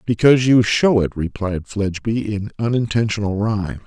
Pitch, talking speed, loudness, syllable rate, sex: 105 Hz, 140 wpm, -18 LUFS, 5.3 syllables/s, male